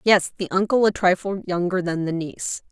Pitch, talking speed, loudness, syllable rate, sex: 185 Hz, 200 wpm, -22 LUFS, 5.4 syllables/s, female